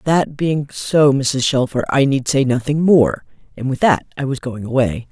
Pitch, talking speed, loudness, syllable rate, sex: 135 Hz, 200 wpm, -17 LUFS, 4.5 syllables/s, female